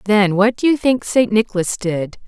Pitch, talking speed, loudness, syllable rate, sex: 210 Hz, 210 wpm, -17 LUFS, 4.8 syllables/s, female